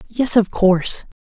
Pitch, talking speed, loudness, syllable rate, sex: 205 Hz, 145 wpm, -16 LUFS, 4.4 syllables/s, female